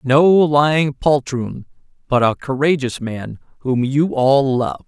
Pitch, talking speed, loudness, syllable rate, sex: 135 Hz, 135 wpm, -17 LUFS, 3.7 syllables/s, male